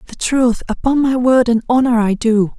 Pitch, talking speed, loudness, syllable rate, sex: 240 Hz, 210 wpm, -15 LUFS, 4.9 syllables/s, male